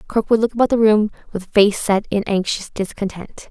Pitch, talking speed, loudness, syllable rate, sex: 205 Hz, 190 wpm, -18 LUFS, 5.6 syllables/s, female